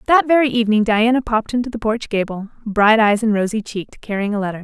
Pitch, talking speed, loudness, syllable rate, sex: 220 Hz, 220 wpm, -17 LUFS, 6.5 syllables/s, female